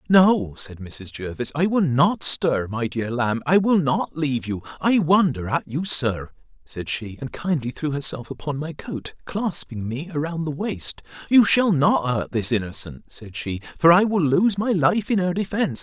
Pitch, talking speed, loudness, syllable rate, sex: 150 Hz, 195 wpm, -22 LUFS, 4.4 syllables/s, male